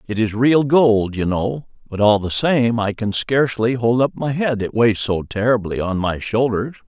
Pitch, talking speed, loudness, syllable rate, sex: 115 Hz, 210 wpm, -18 LUFS, 4.5 syllables/s, male